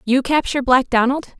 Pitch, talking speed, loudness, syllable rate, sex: 260 Hz, 175 wpm, -17 LUFS, 6.0 syllables/s, female